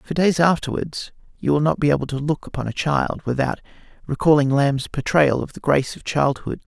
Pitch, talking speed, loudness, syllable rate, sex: 145 Hz, 195 wpm, -21 LUFS, 5.4 syllables/s, male